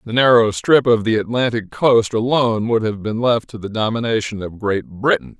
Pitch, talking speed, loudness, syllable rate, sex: 110 Hz, 200 wpm, -17 LUFS, 5.2 syllables/s, male